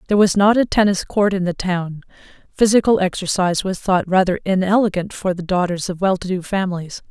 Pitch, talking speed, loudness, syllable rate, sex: 190 Hz, 195 wpm, -18 LUFS, 5.8 syllables/s, female